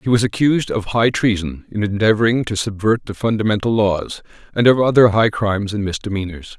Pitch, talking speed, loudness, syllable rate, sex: 105 Hz, 180 wpm, -17 LUFS, 5.7 syllables/s, male